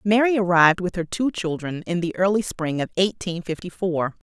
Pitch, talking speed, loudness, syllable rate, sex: 180 Hz, 195 wpm, -22 LUFS, 5.3 syllables/s, female